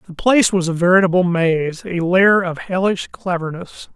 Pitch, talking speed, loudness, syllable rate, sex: 180 Hz, 165 wpm, -17 LUFS, 4.8 syllables/s, male